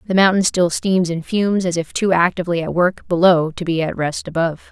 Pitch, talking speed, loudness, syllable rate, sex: 175 Hz, 230 wpm, -18 LUFS, 5.7 syllables/s, female